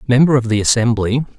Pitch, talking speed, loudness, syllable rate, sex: 120 Hz, 175 wpm, -15 LUFS, 6.3 syllables/s, male